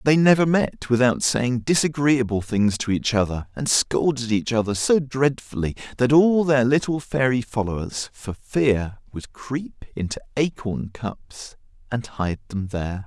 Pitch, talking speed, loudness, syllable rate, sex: 125 Hz, 150 wpm, -22 LUFS, 4.3 syllables/s, male